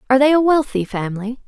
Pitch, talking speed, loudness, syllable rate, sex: 250 Hz, 205 wpm, -17 LUFS, 7.4 syllables/s, female